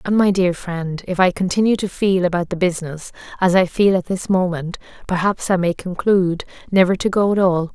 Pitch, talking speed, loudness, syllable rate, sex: 185 Hz, 200 wpm, -18 LUFS, 5.5 syllables/s, female